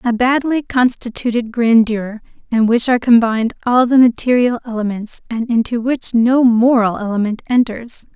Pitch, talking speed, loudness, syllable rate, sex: 235 Hz, 140 wpm, -15 LUFS, 4.9 syllables/s, female